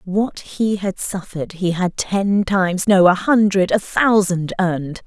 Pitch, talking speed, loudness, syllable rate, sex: 190 Hz, 140 wpm, -18 LUFS, 4.1 syllables/s, female